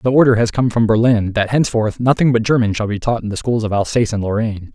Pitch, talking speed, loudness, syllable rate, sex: 115 Hz, 265 wpm, -16 LUFS, 6.6 syllables/s, male